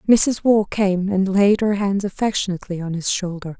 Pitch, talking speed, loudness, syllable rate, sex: 195 Hz, 185 wpm, -19 LUFS, 5.1 syllables/s, female